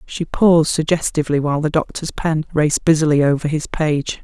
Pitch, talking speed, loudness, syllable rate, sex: 155 Hz, 170 wpm, -17 LUFS, 5.7 syllables/s, female